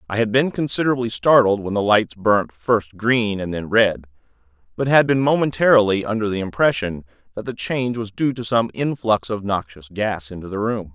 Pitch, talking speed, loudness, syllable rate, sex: 110 Hz, 190 wpm, -19 LUFS, 5.3 syllables/s, male